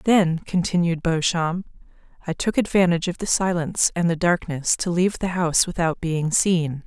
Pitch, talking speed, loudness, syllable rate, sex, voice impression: 170 Hz, 165 wpm, -21 LUFS, 5.0 syllables/s, female, feminine, slightly gender-neutral, very adult-like, slightly middle-aged, slightly thin, slightly relaxed, slightly dark, slightly hard, slightly muffled, very fluent, slightly cool, very intellectual, very sincere, calm, slightly kind